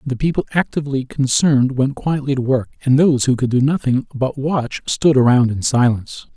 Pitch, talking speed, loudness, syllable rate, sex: 135 Hz, 200 wpm, -17 LUFS, 5.6 syllables/s, male